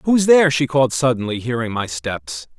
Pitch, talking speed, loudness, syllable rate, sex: 125 Hz, 185 wpm, -18 LUFS, 5.4 syllables/s, male